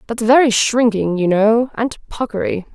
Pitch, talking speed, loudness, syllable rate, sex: 230 Hz, 155 wpm, -16 LUFS, 4.7 syllables/s, female